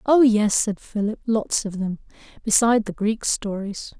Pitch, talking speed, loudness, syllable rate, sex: 215 Hz, 165 wpm, -21 LUFS, 4.6 syllables/s, female